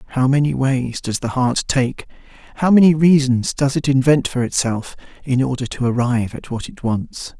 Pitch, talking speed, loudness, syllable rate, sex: 135 Hz, 185 wpm, -18 LUFS, 5.0 syllables/s, male